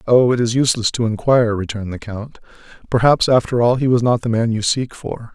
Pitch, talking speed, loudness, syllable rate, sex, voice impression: 115 Hz, 225 wpm, -17 LUFS, 6.0 syllables/s, male, masculine, adult-like, slightly thick, slightly muffled, cool, sincere, friendly, kind